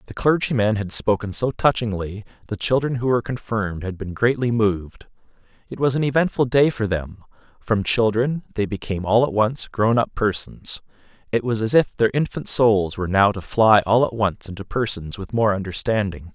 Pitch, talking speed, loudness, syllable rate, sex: 110 Hz, 185 wpm, -21 LUFS, 5.3 syllables/s, male